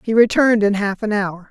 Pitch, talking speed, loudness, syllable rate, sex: 210 Hz, 240 wpm, -17 LUFS, 5.7 syllables/s, female